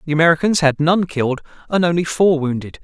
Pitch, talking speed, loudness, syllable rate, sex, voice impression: 160 Hz, 190 wpm, -17 LUFS, 6.2 syllables/s, male, masculine, slightly adult-like, tensed, bright, clear, fluent, cool, intellectual, refreshing, sincere, friendly, reassuring, lively, kind